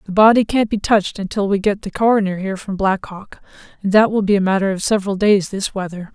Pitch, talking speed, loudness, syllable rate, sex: 200 Hz, 245 wpm, -17 LUFS, 6.3 syllables/s, female